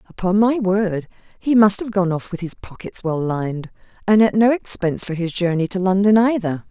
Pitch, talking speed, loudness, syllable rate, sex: 190 Hz, 205 wpm, -18 LUFS, 5.3 syllables/s, female